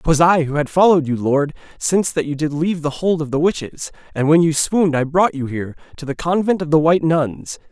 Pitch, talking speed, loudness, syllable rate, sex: 155 Hz, 250 wpm, -17 LUFS, 5.9 syllables/s, male